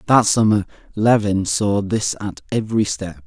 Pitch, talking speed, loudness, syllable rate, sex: 105 Hz, 145 wpm, -19 LUFS, 4.5 syllables/s, male